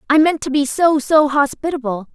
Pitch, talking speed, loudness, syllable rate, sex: 290 Hz, 140 wpm, -16 LUFS, 5.2 syllables/s, female